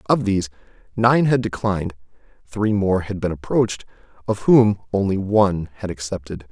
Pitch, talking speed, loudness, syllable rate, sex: 100 Hz, 145 wpm, -20 LUFS, 5.2 syllables/s, male